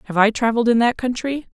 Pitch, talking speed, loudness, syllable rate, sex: 235 Hz, 230 wpm, -19 LUFS, 6.9 syllables/s, female